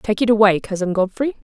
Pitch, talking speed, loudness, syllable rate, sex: 210 Hz, 200 wpm, -18 LUFS, 5.8 syllables/s, female